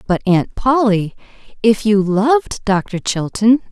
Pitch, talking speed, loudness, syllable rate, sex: 215 Hz, 130 wpm, -16 LUFS, 3.8 syllables/s, female